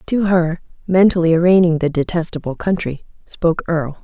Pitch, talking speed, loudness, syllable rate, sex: 170 Hz, 135 wpm, -17 LUFS, 5.6 syllables/s, female